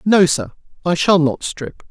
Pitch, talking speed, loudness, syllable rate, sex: 160 Hz, 190 wpm, -17 LUFS, 4.1 syllables/s, male